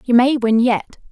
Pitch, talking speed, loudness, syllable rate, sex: 240 Hz, 215 wpm, -16 LUFS, 4.3 syllables/s, female